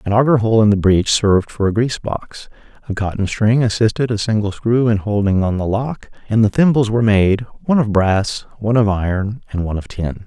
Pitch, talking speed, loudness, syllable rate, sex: 105 Hz, 220 wpm, -17 LUFS, 5.7 syllables/s, male